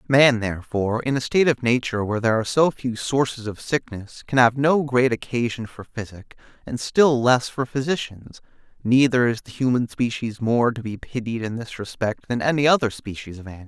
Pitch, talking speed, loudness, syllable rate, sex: 120 Hz, 195 wpm, -22 LUFS, 5.6 syllables/s, male